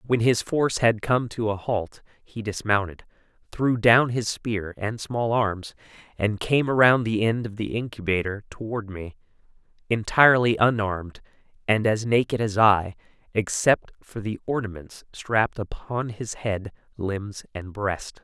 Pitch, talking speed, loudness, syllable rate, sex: 110 Hz, 150 wpm, -24 LUFS, 4.3 syllables/s, male